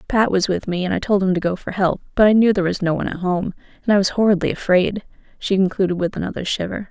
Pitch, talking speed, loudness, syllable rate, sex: 190 Hz, 260 wpm, -19 LUFS, 6.8 syllables/s, female